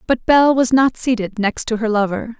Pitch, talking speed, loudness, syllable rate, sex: 235 Hz, 225 wpm, -16 LUFS, 4.9 syllables/s, female